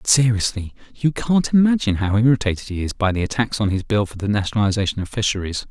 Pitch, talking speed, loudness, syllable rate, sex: 110 Hz, 210 wpm, -20 LUFS, 6.6 syllables/s, male